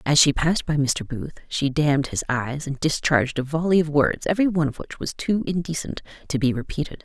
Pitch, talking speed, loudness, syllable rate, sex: 150 Hz, 220 wpm, -23 LUFS, 5.7 syllables/s, female